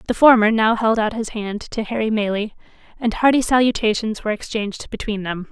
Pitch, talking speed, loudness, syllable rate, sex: 220 Hz, 185 wpm, -19 LUFS, 5.7 syllables/s, female